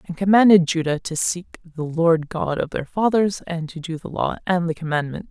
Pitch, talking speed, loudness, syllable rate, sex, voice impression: 170 Hz, 215 wpm, -21 LUFS, 5.0 syllables/s, female, slightly feminine, adult-like, intellectual, slightly calm, reassuring